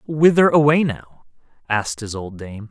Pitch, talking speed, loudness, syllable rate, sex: 125 Hz, 155 wpm, -18 LUFS, 4.4 syllables/s, male